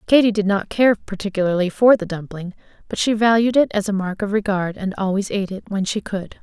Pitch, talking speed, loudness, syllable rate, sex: 200 Hz, 225 wpm, -19 LUFS, 5.8 syllables/s, female